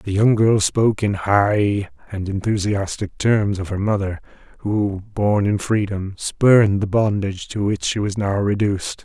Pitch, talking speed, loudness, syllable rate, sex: 100 Hz, 165 wpm, -19 LUFS, 4.4 syllables/s, male